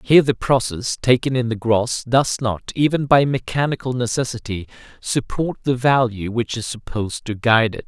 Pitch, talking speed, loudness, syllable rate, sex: 120 Hz, 170 wpm, -20 LUFS, 5.1 syllables/s, male